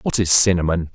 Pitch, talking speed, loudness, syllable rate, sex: 85 Hz, 190 wpm, -16 LUFS, 5.9 syllables/s, male